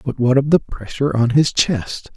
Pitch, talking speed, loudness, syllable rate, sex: 130 Hz, 220 wpm, -17 LUFS, 4.9 syllables/s, male